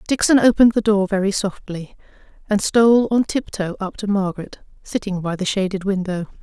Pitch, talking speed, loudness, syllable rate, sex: 200 Hz, 170 wpm, -19 LUFS, 5.6 syllables/s, female